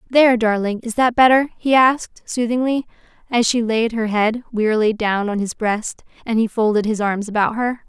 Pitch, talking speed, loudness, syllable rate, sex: 225 Hz, 190 wpm, -18 LUFS, 5.2 syllables/s, female